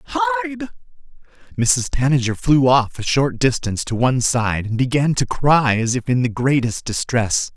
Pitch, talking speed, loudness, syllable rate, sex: 125 Hz, 165 wpm, -18 LUFS, 5.4 syllables/s, male